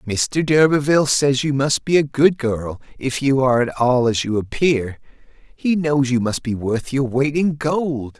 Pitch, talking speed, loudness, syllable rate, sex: 135 Hz, 200 wpm, -18 LUFS, 4.3 syllables/s, male